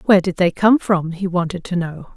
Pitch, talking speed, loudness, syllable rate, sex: 180 Hz, 250 wpm, -18 LUFS, 5.6 syllables/s, female